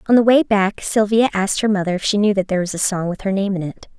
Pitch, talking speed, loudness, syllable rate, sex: 200 Hz, 315 wpm, -18 LUFS, 6.8 syllables/s, female